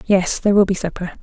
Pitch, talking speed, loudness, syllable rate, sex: 190 Hz, 245 wpm, -17 LUFS, 6.9 syllables/s, female